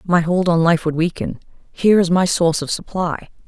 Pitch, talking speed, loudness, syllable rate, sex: 170 Hz, 205 wpm, -18 LUFS, 5.5 syllables/s, female